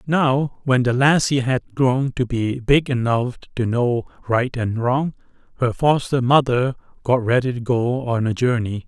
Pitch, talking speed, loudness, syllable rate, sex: 125 Hz, 170 wpm, -20 LUFS, 4.2 syllables/s, male